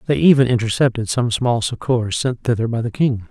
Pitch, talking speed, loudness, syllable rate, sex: 115 Hz, 200 wpm, -18 LUFS, 5.4 syllables/s, male